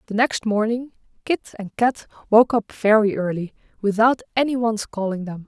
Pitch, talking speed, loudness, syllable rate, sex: 220 Hz, 165 wpm, -21 LUFS, 5.1 syllables/s, female